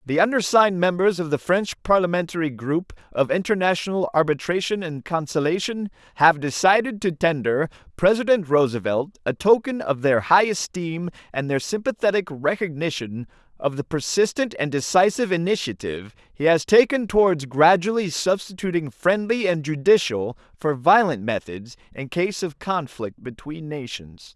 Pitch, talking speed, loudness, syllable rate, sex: 165 Hz, 130 wpm, -21 LUFS, 5.0 syllables/s, male